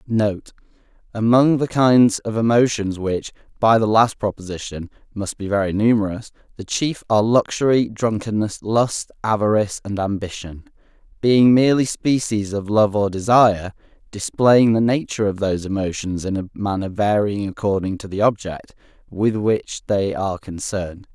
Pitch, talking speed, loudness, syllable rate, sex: 105 Hz, 140 wpm, -19 LUFS, 4.9 syllables/s, male